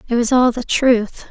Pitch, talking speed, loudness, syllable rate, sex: 240 Hz, 230 wpm, -16 LUFS, 4.5 syllables/s, female